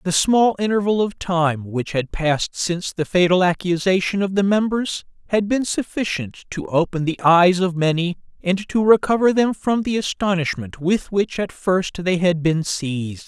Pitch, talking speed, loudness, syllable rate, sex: 185 Hz, 175 wpm, -20 LUFS, 4.7 syllables/s, male